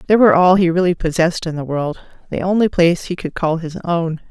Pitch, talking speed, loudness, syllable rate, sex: 170 Hz, 235 wpm, -16 LUFS, 6.2 syllables/s, female